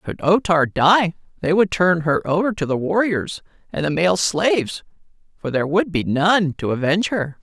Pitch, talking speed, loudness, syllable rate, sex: 170 Hz, 195 wpm, -19 LUFS, 4.8 syllables/s, male